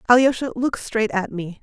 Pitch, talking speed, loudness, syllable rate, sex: 235 Hz, 185 wpm, -21 LUFS, 5.0 syllables/s, female